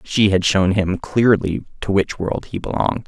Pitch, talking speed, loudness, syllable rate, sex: 100 Hz, 195 wpm, -19 LUFS, 4.7 syllables/s, male